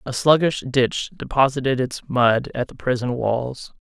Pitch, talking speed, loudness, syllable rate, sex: 130 Hz, 155 wpm, -21 LUFS, 4.1 syllables/s, male